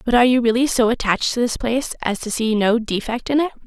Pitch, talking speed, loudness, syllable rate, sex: 235 Hz, 260 wpm, -19 LUFS, 6.5 syllables/s, female